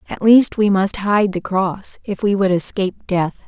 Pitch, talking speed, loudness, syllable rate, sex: 195 Hz, 205 wpm, -17 LUFS, 4.4 syllables/s, female